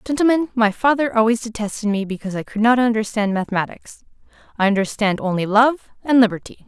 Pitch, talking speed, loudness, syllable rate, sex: 225 Hz, 160 wpm, -19 LUFS, 6.2 syllables/s, female